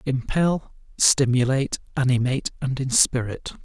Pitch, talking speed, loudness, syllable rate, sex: 130 Hz, 80 wpm, -22 LUFS, 4.7 syllables/s, male